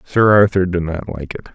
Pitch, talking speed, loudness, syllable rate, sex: 90 Hz, 235 wpm, -16 LUFS, 5.8 syllables/s, male